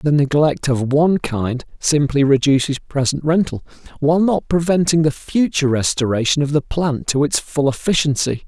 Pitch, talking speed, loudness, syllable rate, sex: 145 Hz, 155 wpm, -17 LUFS, 5.1 syllables/s, male